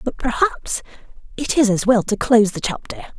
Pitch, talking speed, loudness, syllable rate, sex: 240 Hz, 190 wpm, -19 LUFS, 5.6 syllables/s, female